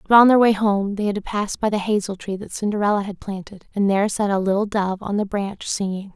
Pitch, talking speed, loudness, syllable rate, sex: 200 Hz, 265 wpm, -21 LUFS, 5.8 syllables/s, female